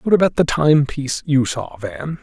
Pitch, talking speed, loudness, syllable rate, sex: 140 Hz, 215 wpm, -18 LUFS, 4.7 syllables/s, male